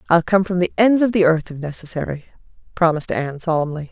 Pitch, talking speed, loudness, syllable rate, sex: 170 Hz, 200 wpm, -19 LUFS, 6.6 syllables/s, female